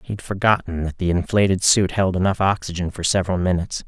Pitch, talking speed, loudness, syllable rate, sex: 90 Hz, 185 wpm, -20 LUFS, 6.1 syllables/s, male